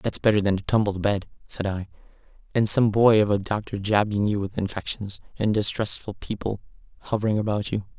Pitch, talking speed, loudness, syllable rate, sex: 105 Hz, 180 wpm, -24 LUFS, 5.6 syllables/s, male